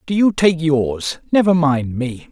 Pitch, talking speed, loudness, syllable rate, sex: 150 Hz, 180 wpm, -17 LUFS, 3.9 syllables/s, male